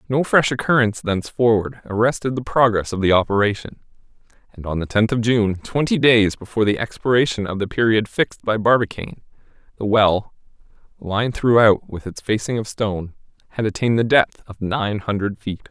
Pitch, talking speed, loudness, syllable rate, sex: 110 Hz, 170 wpm, -19 LUFS, 5.7 syllables/s, male